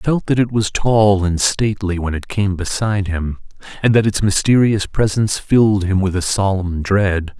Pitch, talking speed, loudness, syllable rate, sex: 100 Hz, 195 wpm, -17 LUFS, 5.0 syllables/s, male